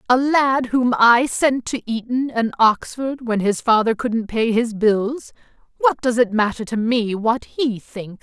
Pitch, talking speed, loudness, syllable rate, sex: 235 Hz, 175 wpm, -19 LUFS, 3.9 syllables/s, female